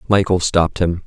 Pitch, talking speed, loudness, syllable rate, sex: 85 Hz, 170 wpm, -17 LUFS, 5.7 syllables/s, male